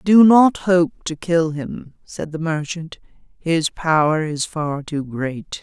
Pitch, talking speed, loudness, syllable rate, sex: 160 Hz, 160 wpm, -19 LUFS, 3.3 syllables/s, female